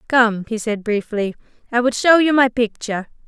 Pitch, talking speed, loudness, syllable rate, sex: 235 Hz, 185 wpm, -18 LUFS, 5.1 syllables/s, female